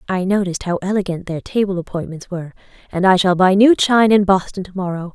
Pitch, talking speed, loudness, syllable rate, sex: 190 Hz, 210 wpm, -17 LUFS, 6.4 syllables/s, female